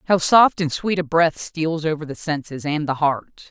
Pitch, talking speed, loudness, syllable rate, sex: 160 Hz, 225 wpm, -20 LUFS, 4.5 syllables/s, female